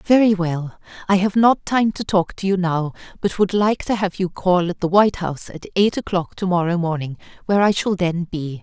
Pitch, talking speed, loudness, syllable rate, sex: 185 Hz, 230 wpm, -19 LUFS, 5.3 syllables/s, female